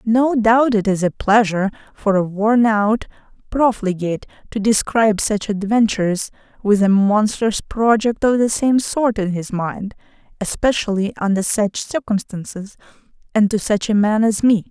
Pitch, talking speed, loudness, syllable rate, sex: 215 Hz, 145 wpm, -18 LUFS, 4.5 syllables/s, female